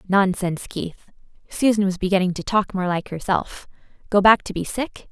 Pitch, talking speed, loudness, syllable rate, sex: 195 Hz, 175 wpm, -21 LUFS, 3.1 syllables/s, female